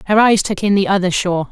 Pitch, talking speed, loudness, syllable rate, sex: 195 Hz, 280 wpm, -15 LUFS, 6.9 syllables/s, female